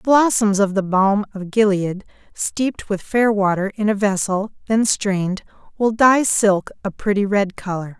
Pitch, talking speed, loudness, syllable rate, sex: 205 Hz, 175 wpm, -19 LUFS, 4.5 syllables/s, female